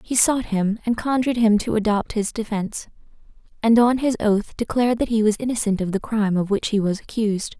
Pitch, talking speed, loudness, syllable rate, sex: 220 Hz, 215 wpm, -21 LUFS, 5.9 syllables/s, female